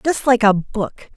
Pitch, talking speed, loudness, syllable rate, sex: 220 Hz, 205 wpm, -17 LUFS, 3.9 syllables/s, female